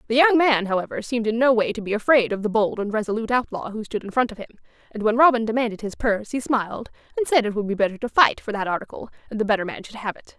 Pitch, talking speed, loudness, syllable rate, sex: 225 Hz, 285 wpm, -22 LUFS, 7.1 syllables/s, female